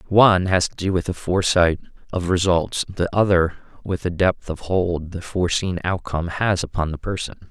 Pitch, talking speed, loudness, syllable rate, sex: 90 Hz, 185 wpm, -21 LUFS, 5.2 syllables/s, male